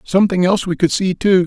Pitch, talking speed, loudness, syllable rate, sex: 185 Hz, 245 wpm, -16 LUFS, 6.6 syllables/s, male